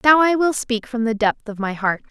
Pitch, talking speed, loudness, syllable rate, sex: 240 Hz, 315 wpm, -20 LUFS, 5.5 syllables/s, female